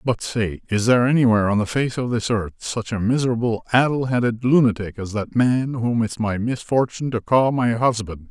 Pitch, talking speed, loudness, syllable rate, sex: 115 Hz, 200 wpm, -20 LUFS, 5.4 syllables/s, male